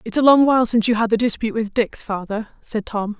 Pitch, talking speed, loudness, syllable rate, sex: 225 Hz, 265 wpm, -19 LUFS, 6.4 syllables/s, female